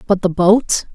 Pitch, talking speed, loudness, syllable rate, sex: 195 Hz, 190 wpm, -15 LUFS, 4.2 syllables/s, female